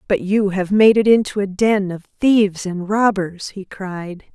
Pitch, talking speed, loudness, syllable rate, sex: 200 Hz, 195 wpm, -17 LUFS, 4.2 syllables/s, female